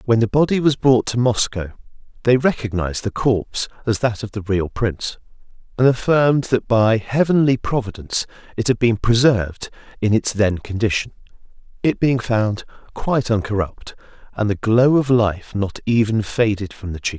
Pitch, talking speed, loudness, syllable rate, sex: 115 Hz, 160 wpm, -19 LUFS, 5.1 syllables/s, male